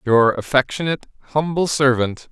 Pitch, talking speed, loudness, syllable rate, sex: 135 Hz, 105 wpm, -19 LUFS, 5.1 syllables/s, male